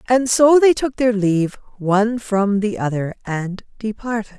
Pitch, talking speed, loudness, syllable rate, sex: 215 Hz, 165 wpm, -18 LUFS, 4.6 syllables/s, female